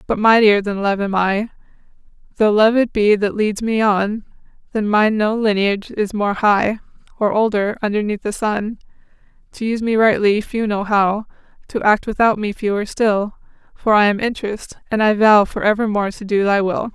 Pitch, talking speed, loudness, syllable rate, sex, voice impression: 210 Hz, 185 wpm, -17 LUFS, 5.0 syllables/s, female, feminine, slightly adult-like, slightly muffled, calm, friendly, slightly reassuring, slightly kind